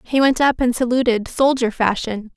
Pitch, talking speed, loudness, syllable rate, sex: 245 Hz, 180 wpm, -18 LUFS, 4.9 syllables/s, female